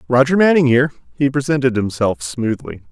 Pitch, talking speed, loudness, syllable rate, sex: 130 Hz, 145 wpm, -16 LUFS, 5.8 syllables/s, male